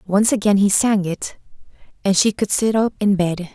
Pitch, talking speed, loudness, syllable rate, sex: 200 Hz, 205 wpm, -18 LUFS, 4.9 syllables/s, female